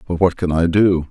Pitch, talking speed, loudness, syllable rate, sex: 90 Hz, 270 wpm, -17 LUFS, 5.3 syllables/s, male